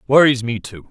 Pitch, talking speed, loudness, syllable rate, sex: 120 Hz, 200 wpm, -16 LUFS, 5.3 syllables/s, male